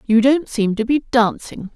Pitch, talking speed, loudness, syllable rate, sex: 235 Hz, 205 wpm, -17 LUFS, 4.3 syllables/s, female